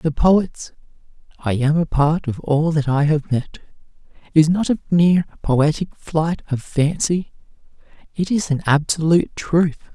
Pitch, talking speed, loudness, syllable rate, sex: 155 Hz, 150 wpm, -19 LUFS, 4.3 syllables/s, male